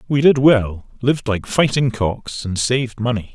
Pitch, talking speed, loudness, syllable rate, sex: 120 Hz, 180 wpm, -18 LUFS, 4.6 syllables/s, male